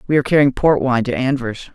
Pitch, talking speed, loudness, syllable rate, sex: 135 Hz, 240 wpm, -17 LUFS, 6.3 syllables/s, male